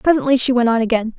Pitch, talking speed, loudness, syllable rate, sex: 245 Hz, 255 wpm, -16 LUFS, 7.0 syllables/s, female